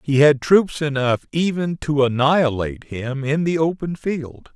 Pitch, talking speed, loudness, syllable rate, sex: 145 Hz, 160 wpm, -19 LUFS, 4.4 syllables/s, male